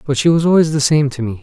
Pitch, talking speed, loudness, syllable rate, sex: 145 Hz, 335 wpm, -14 LUFS, 6.9 syllables/s, male